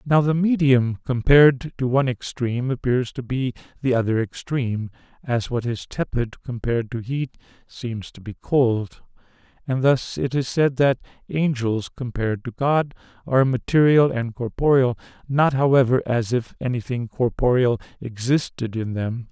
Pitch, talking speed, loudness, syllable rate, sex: 125 Hz, 145 wpm, -22 LUFS, 4.7 syllables/s, male